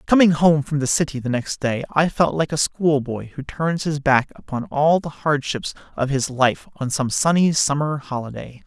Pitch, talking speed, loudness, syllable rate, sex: 145 Hz, 200 wpm, -20 LUFS, 4.7 syllables/s, male